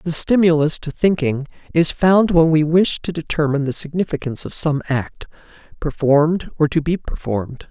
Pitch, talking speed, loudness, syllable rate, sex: 155 Hz, 165 wpm, -18 LUFS, 5.2 syllables/s, male